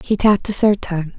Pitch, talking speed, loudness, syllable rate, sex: 195 Hz, 255 wpm, -17 LUFS, 5.6 syllables/s, female